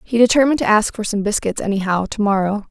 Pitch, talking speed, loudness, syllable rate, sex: 215 Hz, 220 wpm, -17 LUFS, 6.6 syllables/s, female